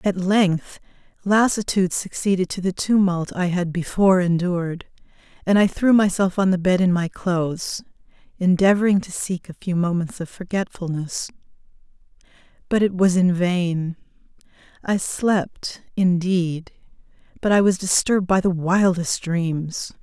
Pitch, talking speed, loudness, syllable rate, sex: 185 Hz, 135 wpm, -21 LUFS, 4.5 syllables/s, female